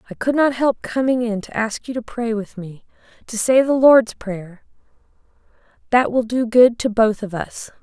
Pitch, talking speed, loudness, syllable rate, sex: 230 Hz, 190 wpm, -18 LUFS, 4.6 syllables/s, female